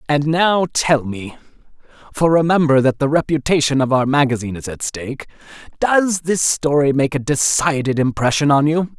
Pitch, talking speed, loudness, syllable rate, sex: 145 Hz, 145 wpm, -17 LUFS, 5.0 syllables/s, male